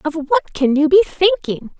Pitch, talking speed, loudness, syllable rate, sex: 325 Hz, 200 wpm, -16 LUFS, 4.6 syllables/s, female